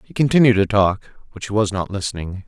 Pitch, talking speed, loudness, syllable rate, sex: 105 Hz, 220 wpm, -18 LUFS, 6.0 syllables/s, male